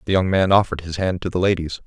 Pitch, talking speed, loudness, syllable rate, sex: 90 Hz, 290 wpm, -20 LUFS, 7.1 syllables/s, male